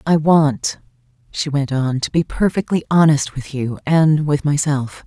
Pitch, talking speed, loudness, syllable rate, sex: 145 Hz, 155 wpm, -17 LUFS, 4.2 syllables/s, female